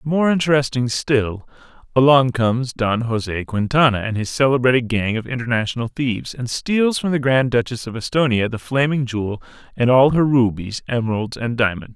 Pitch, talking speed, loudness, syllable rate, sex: 125 Hz, 160 wpm, -19 LUFS, 5.2 syllables/s, male